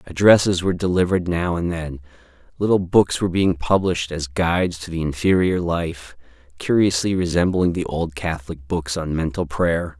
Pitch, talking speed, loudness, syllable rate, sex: 85 Hz, 155 wpm, -20 LUFS, 5.2 syllables/s, male